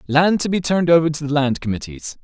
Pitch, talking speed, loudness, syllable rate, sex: 150 Hz, 240 wpm, -18 LUFS, 6.5 syllables/s, male